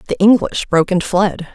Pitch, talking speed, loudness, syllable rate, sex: 190 Hz, 195 wpm, -15 LUFS, 5.5 syllables/s, female